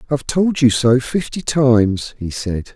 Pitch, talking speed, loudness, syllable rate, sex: 130 Hz, 175 wpm, -17 LUFS, 4.4 syllables/s, male